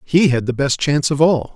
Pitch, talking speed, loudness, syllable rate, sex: 140 Hz, 270 wpm, -16 LUFS, 5.5 syllables/s, male